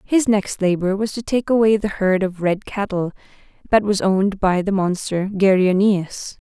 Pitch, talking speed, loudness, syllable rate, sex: 195 Hz, 175 wpm, -19 LUFS, 4.6 syllables/s, female